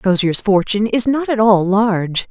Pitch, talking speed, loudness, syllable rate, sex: 205 Hz, 180 wpm, -15 LUFS, 5.0 syllables/s, female